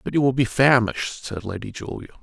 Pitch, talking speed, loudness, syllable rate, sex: 120 Hz, 215 wpm, -22 LUFS, 6.0 syllables/s, male